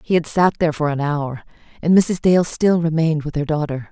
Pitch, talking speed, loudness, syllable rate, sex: 160 Hz, 230 wpm, -18 LUFS, 5.7 syllables/s, female